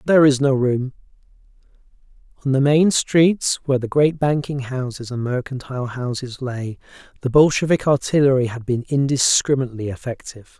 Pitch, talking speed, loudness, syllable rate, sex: 135 Hz, 135 wpm, -19 LUFS, 5.5 syllables/s, male